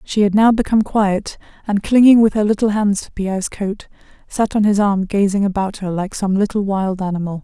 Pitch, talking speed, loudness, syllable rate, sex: 200 Hz, 210 wpm, -17 LUFS, 5.4 syllables/s, female